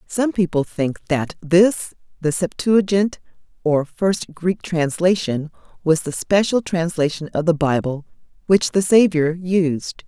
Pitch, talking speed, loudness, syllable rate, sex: 170 Hz, 130 wpm, -19 LUFS, 3.9 syllables/s, female